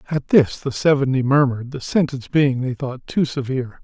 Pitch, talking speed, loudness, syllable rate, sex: 135 Hz, 190 wpm, -19 LUFS, 5.5 syllables/s, male